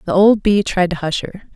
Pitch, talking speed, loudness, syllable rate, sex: 185 Hz, 270 wpm, -16 LUFS, 5.0 syllables/s, female